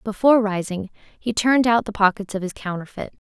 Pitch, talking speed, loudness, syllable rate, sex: 210 Hz, 175 wpm, -21 LUFS, 5.8 syllables/s, female